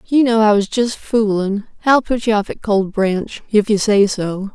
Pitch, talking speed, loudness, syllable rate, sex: 210 Hz, 225 wpm, -16 LUFS, 4.4 syllables/s, female